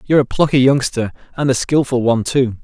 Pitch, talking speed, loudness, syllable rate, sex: 130 Hz, 205 wpm, -16 LUFS, 6.3 syllables/s, male